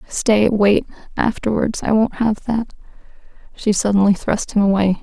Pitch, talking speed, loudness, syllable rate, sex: 210 Hz, 145 wpm, -17 LUFS, 4.5 syllables/s, female